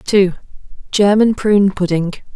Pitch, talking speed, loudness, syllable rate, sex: 195 Hz, 75 wpm, -15 LUFS, 4.5 syllables/s, female